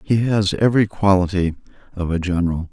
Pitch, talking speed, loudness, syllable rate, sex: 95 Hz, 155 wpm, -19 LUFS, 5.9 syllables/s, male